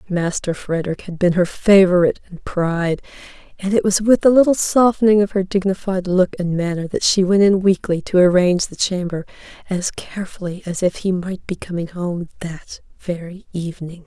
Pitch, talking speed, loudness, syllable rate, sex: 185 Hz, 180 wpm, -18 LUFS, 5.3 syllables/s, female